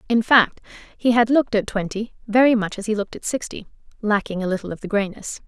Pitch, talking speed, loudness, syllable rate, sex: 215 Hz, 220 wpm, -21 LUFS, 6.1 syllables/s, female